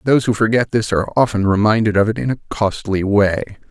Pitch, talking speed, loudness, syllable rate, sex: 110 Hz, 210 wpm, -17 LUFS, 6.0 syllables/s, male